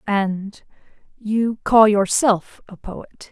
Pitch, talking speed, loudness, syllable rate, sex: 210 Hz, 90 wpm, -18 LUFS, 2.7 syllables/s, female